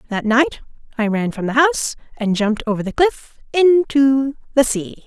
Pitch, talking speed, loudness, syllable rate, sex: 255 Hz, 180 wpm, -18 LUFS, 5.0 syllables/s, female